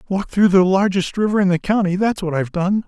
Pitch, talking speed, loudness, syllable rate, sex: 190 Hz, 230 wpm, -17 LUFS, 6.5 syllables/s, male